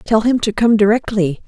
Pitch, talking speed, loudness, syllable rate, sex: 215 Hz, 205 wpm, -15 LUFS, 5.2 syllables/s, female